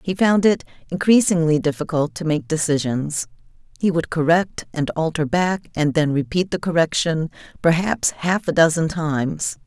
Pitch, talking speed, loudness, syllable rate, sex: 160 Hz, 150 wpm, -20 LUFS, 4.7 syllables/s, female